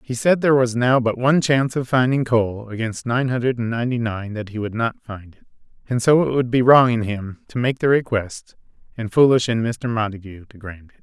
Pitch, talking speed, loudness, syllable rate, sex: 120 Hz, 235 wpm, -19 LUFS, 5.5 syllables/s, male